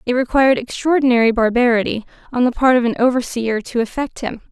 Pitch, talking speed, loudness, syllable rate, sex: 245 Hz, 175 wpm, -17 LUFS, 6.1 syllables/s, female